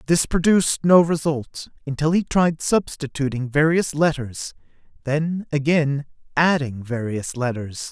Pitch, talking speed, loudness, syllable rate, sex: 150 Hz, 115 wpm, -21 LUFS, 4.2 syllables/s, male